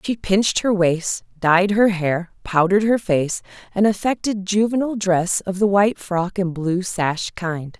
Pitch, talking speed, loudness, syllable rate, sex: 190 Hz, 170 wpm, -20 LUFS, 4.4 syllables/s, female